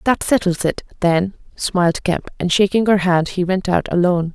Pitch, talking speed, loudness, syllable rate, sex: 180 Hz, 195 wpm, -18 LUFS, 5.0 syllables/s, female